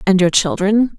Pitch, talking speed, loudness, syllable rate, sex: 200 Hz, 180 wpm, -15 LUFS, 4.8 syllables/s, female